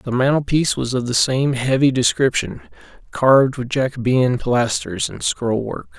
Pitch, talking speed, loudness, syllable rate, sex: 130 Hz, 150 wpm, -18 LUFS, 4.8 syllables/s, male